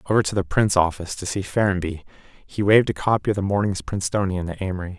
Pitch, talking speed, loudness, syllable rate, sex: 95 Hz, 215 wpm, -22 LUFS, 7.0 syllables/s, male